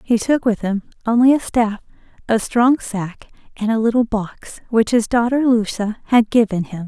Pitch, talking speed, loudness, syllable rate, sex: 225 Hz, 185 wpm, -18 LUFS, 4.7 syllables/s, female